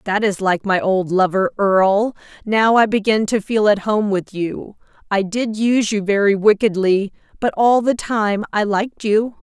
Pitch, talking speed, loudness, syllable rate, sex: 210 Hz, 185 wpm, -17 LUFS, 4.5 syllables/s, female